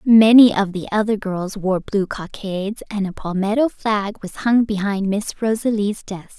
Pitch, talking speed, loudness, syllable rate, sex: 205 Hz, 170 wpm, -19 LUFS, 4.5 syllables/s, female